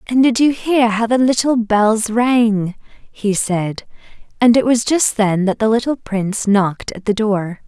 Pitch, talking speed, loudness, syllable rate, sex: 220 Hz, 190 wpm, -16 LUFS, 4.2 syllables/s, female